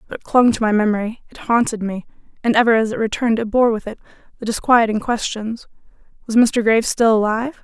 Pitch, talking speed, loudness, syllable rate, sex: 225 Hz, 205 wpm, -18 LUFS, 6.3 syllables/s, female